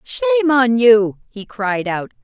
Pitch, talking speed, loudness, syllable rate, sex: 245 Hz, 160 wpm, -15 LUFS, 5.7 syllables/s, female